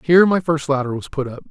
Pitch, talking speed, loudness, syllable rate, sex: 150 Hz, 280 wpm, -19 LUFS, 6.7 syllables/s, male